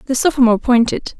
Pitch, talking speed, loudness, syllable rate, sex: 250 Hz, 150 wpm, -14 LUFS, 6.8 syllables/s, female